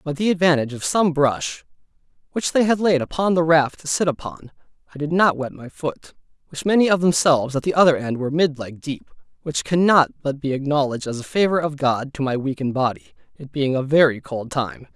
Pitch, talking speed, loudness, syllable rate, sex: 150 Hz, 215 wpm, -20 LUFS, 4.7 syllables/s, male